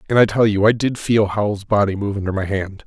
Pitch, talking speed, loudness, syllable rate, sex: 105 Hz, 270 wpm, -18 LUFS, 6.0 syllables/s, male